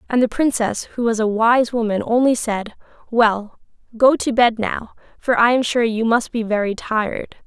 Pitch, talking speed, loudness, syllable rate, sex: 230 Hz, 195 wpm, -18 LUFS, 4.7 syllables/s, female